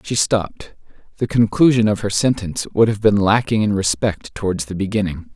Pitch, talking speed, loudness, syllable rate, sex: 100 Hz, 180 wpm, -18 LUFS, 5.5 syllables/s, male